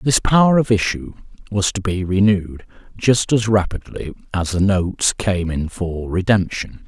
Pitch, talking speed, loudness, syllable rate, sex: 95 Hz, 155 wpm, -18 LUFS, 4.4 syllables/s, male